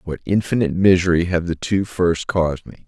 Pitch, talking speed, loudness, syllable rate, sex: 90 Hz, 190 wpm, -19 LUFS, 5.7 syllables/s, male